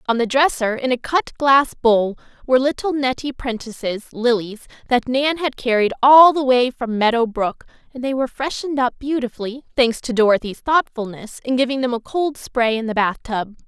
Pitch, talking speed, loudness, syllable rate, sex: 250 Hz, 190 wpm, -19 LUFS, 5.2 syllables/s, female